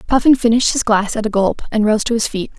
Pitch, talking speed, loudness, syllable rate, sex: 220 Hz, 280 wpm, -15 LUFS, 6.5 syllables/s, female